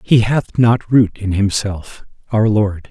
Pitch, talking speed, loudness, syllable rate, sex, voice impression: 105 Hz, 145 wpm, -16 LUFS, 3.6 syllables/s, male, masculine, adult-like, tensed, powerful, bright, clear, fluent, cool, intellectual, mature, friendly, wild, lively